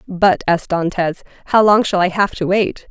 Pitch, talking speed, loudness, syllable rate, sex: 185 Hz, 205 wpm, -16 LUFS, 4.9 syllables/s, female